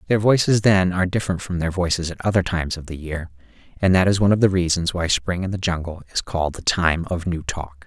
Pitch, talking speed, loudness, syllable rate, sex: 90 Hz, 250 wpm, -21 LUFS, 6.2 syllables/s, male